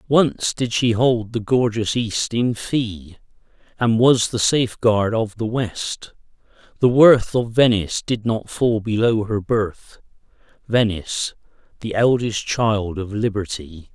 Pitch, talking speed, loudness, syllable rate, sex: 110 Hz, 140 wpm, -19 LUFS, 3.8 syllables/s, male